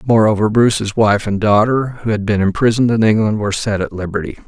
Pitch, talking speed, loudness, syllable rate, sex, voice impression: 105 Hz, 200 wpm, -15 LUFS, 6.0 syllables/s, male, masculine, very adult-like, slightly thick, cool, sincere, slightly calm